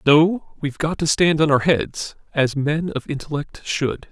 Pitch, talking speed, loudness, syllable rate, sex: 150 Hz, 190 wpm, -20 LUFS, 4.2 syllables/s, male